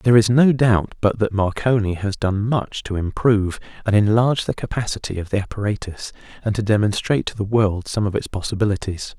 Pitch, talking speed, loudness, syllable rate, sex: 105 Hz, 190 wpm, -20 LUFS, 5.7 syllables/s, male